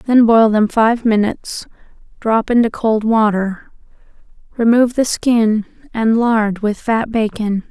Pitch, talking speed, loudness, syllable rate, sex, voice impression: 220 Hz, 130 wpm, -15 LUFS, 4.0 syllables/s, female, feminine, slightly young, slightly soft, slightly cute, friendly, slightly kind